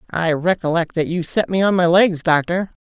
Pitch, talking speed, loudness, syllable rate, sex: 170 Hz, 210 wpm, -18 LUFS, 5.0 syllables/s, female